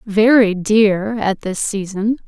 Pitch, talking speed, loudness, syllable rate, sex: 210 Hz, 130 wpm, -16 LUFS, 3.3 syllables/s, female